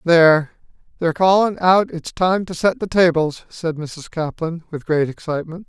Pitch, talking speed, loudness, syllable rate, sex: 170 Hz, 170 wpm, -18 LUFS, 4.8 syllables/s, male